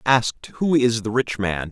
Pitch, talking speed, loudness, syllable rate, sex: 115 Hz, 210 wpm, -21 LUFS, 4.6 syllables/s, male